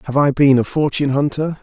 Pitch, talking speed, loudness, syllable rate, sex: 140 Hz, 220 wpm, -16 LUFS, 6.1 syllables/s, male